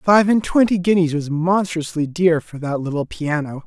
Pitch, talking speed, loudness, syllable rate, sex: 165 Hz, 180 wpm, -19 LUFS, 4.7 syllables/s, male